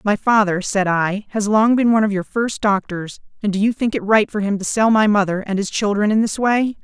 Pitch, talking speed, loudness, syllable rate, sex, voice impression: 205 Hz, 265 wpm, -18 LUFS, 5.5 syllables/s, female, feminine, adult-like, clear, fluent, slightly intellectual